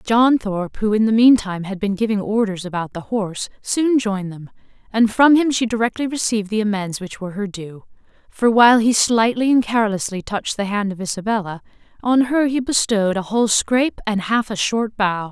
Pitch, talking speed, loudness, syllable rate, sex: 215 Hz, 205 wpm, -18 LUFS, 5.6 syllables/s, female